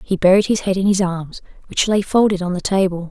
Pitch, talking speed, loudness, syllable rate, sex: 190 Hz, 250 wpm, -17 LUFS, 5.8 syllables/s, female